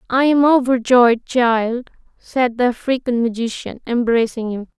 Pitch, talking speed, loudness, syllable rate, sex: 240 Hz, 125 wpm, -17 LUFS, 4.3 syllables/s, female